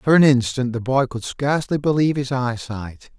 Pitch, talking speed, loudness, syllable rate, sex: 130 Hz, 190 wpm, -20 LUFS, 5.1 syllables/s, male